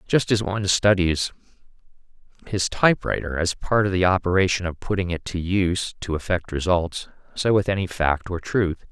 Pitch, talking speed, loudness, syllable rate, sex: 90 Hz, 170 wpm, -22 LUFS, 5.2 syllables/s, male